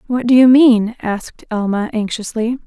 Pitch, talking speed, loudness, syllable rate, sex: 230 Hz, 155 wpm, -15 LUFS, 4.7 syllables/s, female